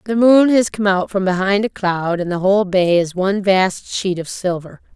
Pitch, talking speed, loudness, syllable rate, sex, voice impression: 190 Hz, 230 wpm, -16 LUFS, 4.9 syllables/s, female, very feminine, slightly young, very adult-like, thin, very tensed, powerful, bright, hard, clear, fluent, slightly raspy, cool, very intellectual, very refreshing, sincere, very calm, friendly, reassuring, unique, elegant, slightly wild, slightly lively, slightly strict, slightly intense, sharp